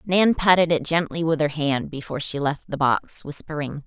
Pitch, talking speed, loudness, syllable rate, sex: 155 Hz, 200 wpm, -22 LUFS, 5.0 syllables/s, female